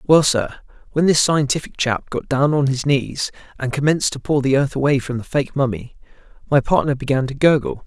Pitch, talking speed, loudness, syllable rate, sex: 140 Hz, 205 wpm, -19 LUFS, 5.4 syllables/s, male